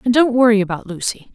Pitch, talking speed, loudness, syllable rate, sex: 225 Hz, 225 wpm, -17 LUFS, 6.5 syllables/s, female